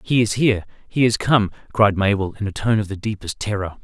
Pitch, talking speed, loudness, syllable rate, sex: 105 Hz, 220 wpm, -20 LUFS, 6.0 syllables/s, male